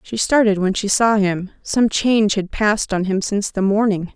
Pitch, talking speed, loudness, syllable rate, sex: 205 Hz, 215 wpm, -18 LUFS, 5.1 syllables/s, female